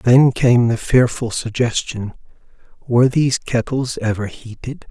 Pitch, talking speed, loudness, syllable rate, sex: 120 Hz, 120 wpm, -17 LUFS, 4.3 syllables/s, male